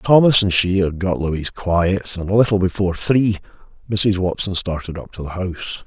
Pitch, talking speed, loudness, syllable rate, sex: 95 Hz, 195 wpm, -19 LUFS, 5.1 syllables/s, male